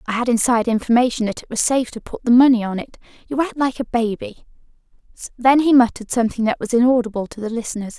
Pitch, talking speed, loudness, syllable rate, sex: 235 Hz, 220 wpm, -18 LUFS, 7.0 syllables/s, female